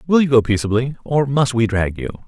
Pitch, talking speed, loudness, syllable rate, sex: 125 Hz, 235 wpm, -17 LUFS, 5.6 syllables/s, male